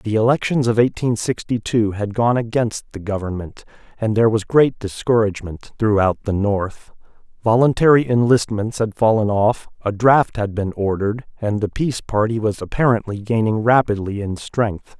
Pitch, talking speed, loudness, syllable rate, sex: 110 Hz, 155 wpm, -19 LUFS, 5.0 syllables/s, male